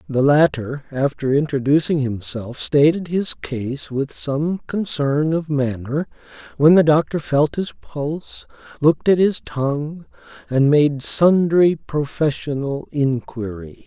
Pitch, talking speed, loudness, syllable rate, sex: 145 Hz, 120 wpm, -19 LUFS, 3.9 syllables/s, male